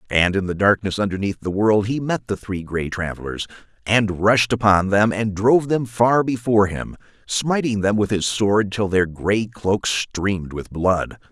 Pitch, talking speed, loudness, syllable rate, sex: 105 Hz, 185 wpm, -20 LUFS, 4.5 syllables/s, male